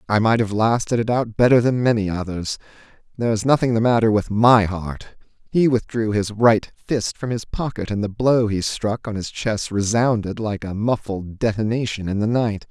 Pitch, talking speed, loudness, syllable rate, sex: 110 Hz, 195 wpm, -20 LUFS, 4.9 syllables/s, male